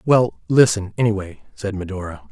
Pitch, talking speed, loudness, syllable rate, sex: 105 Hz, 130 wpm, -20 LUFS, 5.1 syllables/s, male